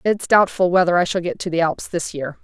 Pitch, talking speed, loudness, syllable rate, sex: 175 Hz, 270 wpm, -19 LUFS, 5.6 syllables/s, female